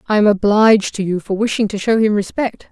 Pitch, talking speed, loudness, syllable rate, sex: 210 Hz, 245 wpm, -16 LUFS, 5.8 syllables/s, female